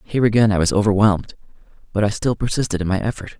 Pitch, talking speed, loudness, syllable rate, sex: 105 Hz, 210 wpm, -19 LUFS, 7.3 syllables/s, male